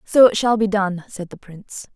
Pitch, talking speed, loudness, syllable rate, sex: 200 Hz, 245 wpm, -17 LUFS, 5.1 syllables/s, female